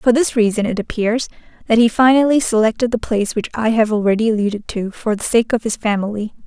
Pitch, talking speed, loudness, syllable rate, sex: 220 Hz, 215 wpm, -17 LUFS, 6.1 syllables/s, female